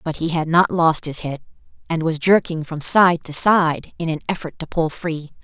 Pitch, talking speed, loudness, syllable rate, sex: 165 Hz, 220 wpm, -19 LUFS, 4.8 syllables/s, female